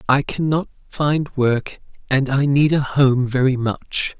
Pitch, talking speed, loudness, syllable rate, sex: 135 Hz, 155 wpm, -19 LUFS, 3.7 syllables/s, male